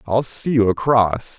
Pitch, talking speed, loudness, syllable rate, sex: 115 Hz, 175 wpm, -18 LUFS, 4.0 syllables/s, male